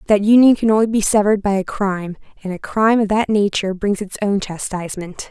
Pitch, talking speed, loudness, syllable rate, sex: 205 Hz, 215 wpm, -17 LUFS, 6.2 syllables/s, female